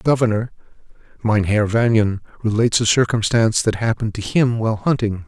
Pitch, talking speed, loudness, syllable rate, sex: 110 Hz, 150 wpm, -18 LUFS, 6.1 syllables/s, male